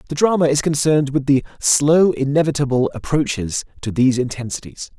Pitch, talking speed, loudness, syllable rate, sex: 140 Hz, 145 wpm, -18 LUFS, 5.7 syllables/s, male